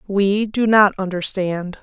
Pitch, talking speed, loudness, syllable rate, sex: 195 Hz, 130 wpm, -18 LUFS, 3.8 syllables/s, female